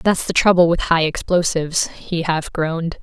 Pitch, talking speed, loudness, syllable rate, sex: 170 Hz, 180 wpm, -18 LUFS, 4.9 syllables/s, female